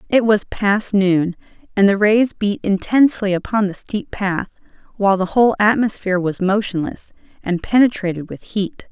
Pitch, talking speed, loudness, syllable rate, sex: 200 Hz, 155 wpm, -18 LUFS, 4.9 syllables/s, female